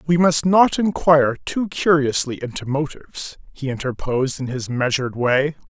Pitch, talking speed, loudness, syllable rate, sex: 145 Hz, 145 wpm, -19 LUFS, 5.0 syllables/s, male